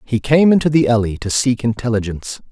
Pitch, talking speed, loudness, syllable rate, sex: 120 Hz, 190 wpm, -16 LUFS, 6.0 syllables/s, male